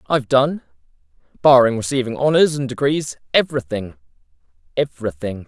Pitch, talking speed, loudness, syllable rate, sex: 130 Hz, 65 wpm, -18 LUFS, 5.9 syllables/s, male